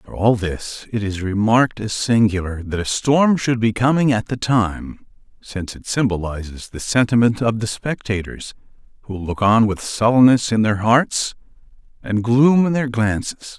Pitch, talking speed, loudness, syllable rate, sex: 110 Hz, 170 wpm, -18 LUFS, 4.6 syllables/s, male